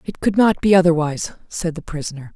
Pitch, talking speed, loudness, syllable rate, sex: 170 Hz, 205 wpm, -18 LUFS, 6.2 syllables/s, female